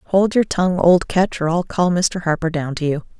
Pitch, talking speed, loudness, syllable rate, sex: 170 Hz, 245 wpm, -18 LUFS, 5.1 syllables/s, female